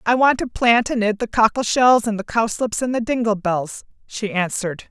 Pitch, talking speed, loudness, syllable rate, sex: 225 Hz, 220 wpm, -19 LUFS, 5.1 syllables/s, female